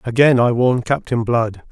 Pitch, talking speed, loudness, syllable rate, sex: 120 Hz, 175 wpm, -16 LUFS, 4.5 syllables/s, male